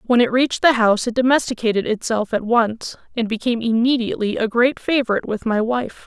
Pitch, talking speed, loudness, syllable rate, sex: 235 Hz, 190 wpm, -19 LUFS, 6.1 syllables/s, female